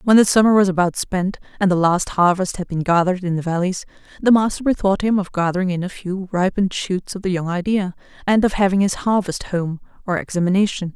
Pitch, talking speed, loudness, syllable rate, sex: 185 Hz, 215 wpm, -19 LUFS, 6.0 syllables/s, female